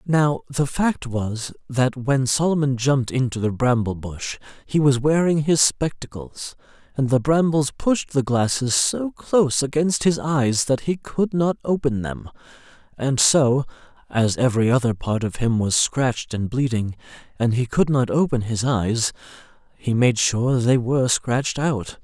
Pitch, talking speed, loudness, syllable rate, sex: 130 Hz, 165 wpm, -21 LUFS, 4.3 syllables/s, male